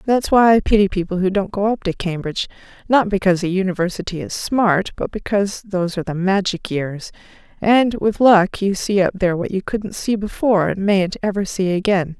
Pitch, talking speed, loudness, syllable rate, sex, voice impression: 195 Hz, 190 wpm, -18 LUFS, 5.6 syllables/s, female, feminine, middle-aged, slightly soft, slightly muffled, intellectual, slightly elegant